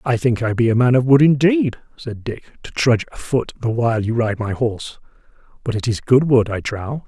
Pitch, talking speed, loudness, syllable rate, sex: 120 Hz, 230 wpm, -18 LUFS, 5.4 syllables/s, male